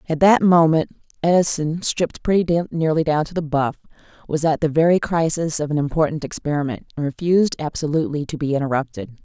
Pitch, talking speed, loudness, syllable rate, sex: 155 Hz, 170 wpm, -20 LUFS, 6.0 syllables/s, female